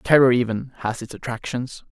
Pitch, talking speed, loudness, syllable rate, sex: 125 Hz, 155 wpm, -22 LUFS, 5.2 syllables/s, male